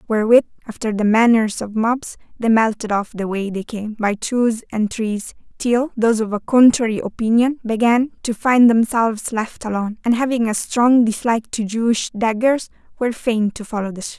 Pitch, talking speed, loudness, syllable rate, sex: 225 Hz, 180 wpm, -18 LUFS, 5.1 syllables/s, female